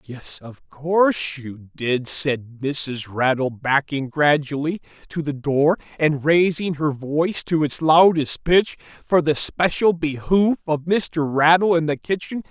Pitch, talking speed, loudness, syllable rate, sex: 150 Hz, 150 wpm, -20 LUFS, 3.7 syllables/s, male